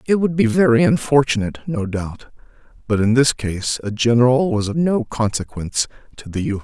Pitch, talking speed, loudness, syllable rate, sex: 120 Hz, 180 wpm, -18 LUFS, 5.3 syllables/s, male